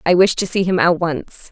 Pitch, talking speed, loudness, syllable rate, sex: 175 Hz, 275 wpm, -17 LUFS, 5.0 syllables/s, female